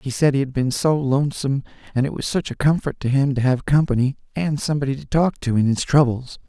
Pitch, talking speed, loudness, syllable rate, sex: 135 Hz, 240 wpm, -20 LUFS, 6.2 syllables/s, male